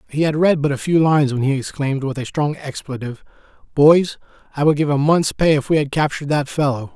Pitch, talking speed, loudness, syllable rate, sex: 145 Hz, 235 wpm, -18 LUFS, 6.2 syllables/s, male